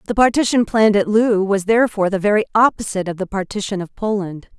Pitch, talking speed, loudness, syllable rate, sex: 205 Hz, 195 wpm, -17 LUFS, 6.6 syllables/s, female